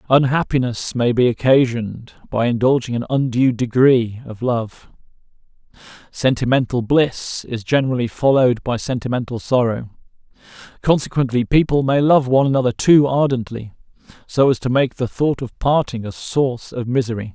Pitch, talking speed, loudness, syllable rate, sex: 125 Hz, 135 wpm, -18 LUFS, 5.2 syllables/s, male